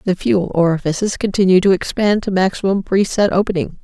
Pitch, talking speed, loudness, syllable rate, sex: 185 Hz, 170 wpm, -16 LUFS, 5.7 syllables/s, female